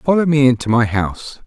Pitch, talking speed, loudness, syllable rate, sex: 130 Hz, 205 wpm, -15 LUFS, 5.7 syllables/s, male